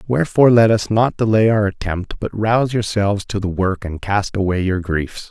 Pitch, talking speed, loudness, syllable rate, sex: 100 Hz, 205 wpm, -17 LUFS, 5.2 syllables/s, male